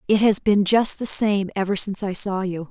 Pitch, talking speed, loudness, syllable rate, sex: 200 Hz, 245 wpm, -20 LUFS, 5.2 syllables/s, female